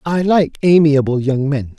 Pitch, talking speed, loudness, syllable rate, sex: 150 Hz, 170 wpm, -14 LUFS, 4.2 syllables/s, male